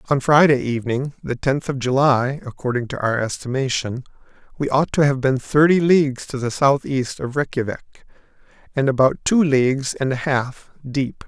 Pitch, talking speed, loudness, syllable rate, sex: 135 Hz, 165 wpm, -19 LUFS, 5.0 syllables/s, male